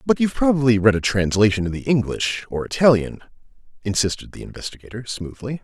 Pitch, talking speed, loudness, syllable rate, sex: 115 Hz, 160 wpm, -20 LUFS, 6.2 syllables/s, male